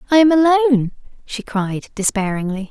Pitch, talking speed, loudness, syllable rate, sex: 235 Hz, 135 wpm, -17 LUFS, 6.2 syllables/s, female